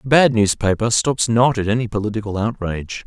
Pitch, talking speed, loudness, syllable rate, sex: 110 Hz, 175 wpm, -18 LUFS, 5.6 syllables/s, male